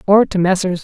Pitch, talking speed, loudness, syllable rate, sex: 190 Hz, 215 wpm, -15 LUFS, 4.0 syllables/s, female